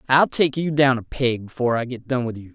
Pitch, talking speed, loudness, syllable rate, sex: 125 Hz, 285 wpm, -21 LUFS, 5.9 syllables/s, male